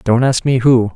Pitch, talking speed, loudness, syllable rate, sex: 125 Hz, 255 wpm, -13 LUFS, 4.8 syllables/s, male